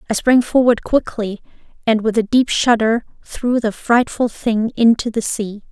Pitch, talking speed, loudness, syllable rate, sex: 230 Hz, 170 wpm, -17 LUFS, 4.4 syllables/s, female